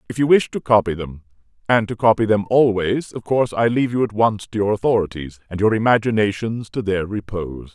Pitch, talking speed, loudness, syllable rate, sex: 105 Hz, 210 wpm, -19 LUFS, 5.8 syllables/s, male